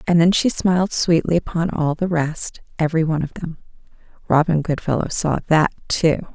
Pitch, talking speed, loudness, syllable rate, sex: 165 Hz, 170 wpm, -19 LUFS, 5.4 syllables/s, female